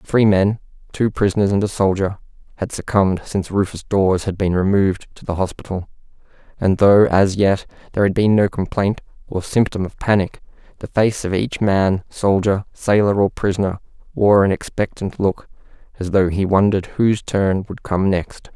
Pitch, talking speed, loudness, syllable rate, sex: 100 Hz, 165 wpm, -18 LUFS, 5.2 syllables/s, male